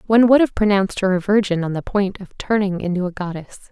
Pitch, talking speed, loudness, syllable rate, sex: 195 Hz, 240 wpm, -19 LUFS, 6.3 syllables/s, female